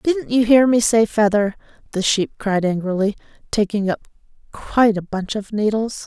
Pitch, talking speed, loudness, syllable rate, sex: 210 Hz, 170 wpm, -19 LUFS, 4.8 syllables/s, female